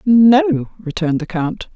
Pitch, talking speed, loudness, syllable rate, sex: 195 Hz, 135 wpm, -16 LUFS, 3.9 syllables/s, female